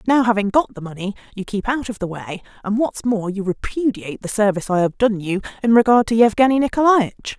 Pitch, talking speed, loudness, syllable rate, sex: 215 Hz, 220 wpm, -19 LUFS, 6.0 syllables/s, female